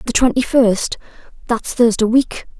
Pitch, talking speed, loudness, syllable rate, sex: 230 Hz, 115 wpm, -16 LUFS, 4.4 syllables/s, female